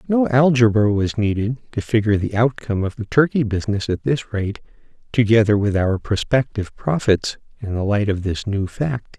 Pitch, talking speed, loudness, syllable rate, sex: 110 Hz, 175 wpm, -19 LUFS, 5.3 syllables/s, male